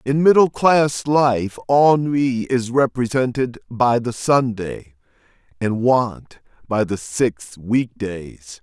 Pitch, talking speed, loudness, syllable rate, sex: 125 Hz, 120 wpm, -19 LUFS, 3.1 syllables/s, male